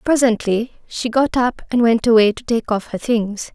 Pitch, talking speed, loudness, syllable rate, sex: 230 Hz, 205 wpm, -18 LUFS, 4.7 syllables/s, female